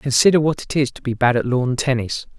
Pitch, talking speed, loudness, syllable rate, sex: 130 Hz, 250 wpm, -19 LUFS, 5.7 syllables/s, male